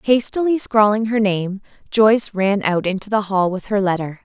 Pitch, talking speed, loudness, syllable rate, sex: 205 Hz, 185 wpm, -18 LUFS, 5.0 syllables/s, female